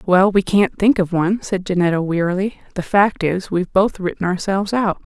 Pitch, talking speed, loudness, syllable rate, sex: 190 Hz, 200 wpm, -18 LUFS, 5.4 syllables/s, female